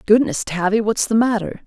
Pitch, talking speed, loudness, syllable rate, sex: 215 Hz, 180 wpm, -18 LUFS, 5.2 syllables/s, female